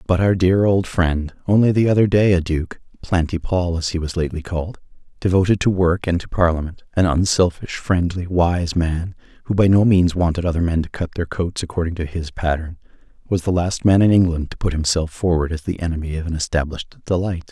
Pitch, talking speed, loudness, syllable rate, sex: 85 Hz, 210 wpm, -19 LUFS, 5.6 syllables/s, male